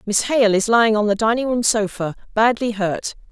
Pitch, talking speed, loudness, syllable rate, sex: 220 Hz, 200 wpm, -18 LUFS, 5.2 syllables/s, female